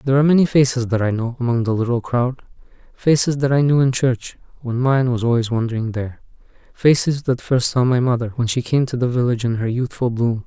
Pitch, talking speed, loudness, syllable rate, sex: 125 Hz, 225 wpm, -18 LUFS, 6.1 syllables/s, male